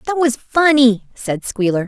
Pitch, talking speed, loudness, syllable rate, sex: 250 Hz, 160 wpm, -16 LUFS, 4.3 syllables/s, female